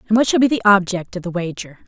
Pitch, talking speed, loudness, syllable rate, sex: 200 Hz, 290 wpm, -17 LUFS, 6.9 syllables/s, female